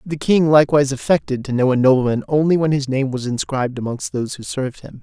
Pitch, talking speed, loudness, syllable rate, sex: 140 Hz, 225 wpm, -18 LUFS, 6.6 syllables/s, male